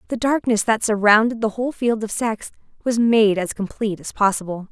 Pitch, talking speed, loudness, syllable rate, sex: 220 Hz, 190 wpm, -20 LUFS, 5.5 syllables/s, female